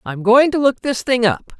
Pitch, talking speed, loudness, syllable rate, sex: 240 Hz, 265 wpm, -16 LUFS, 4.8 syllables/s, female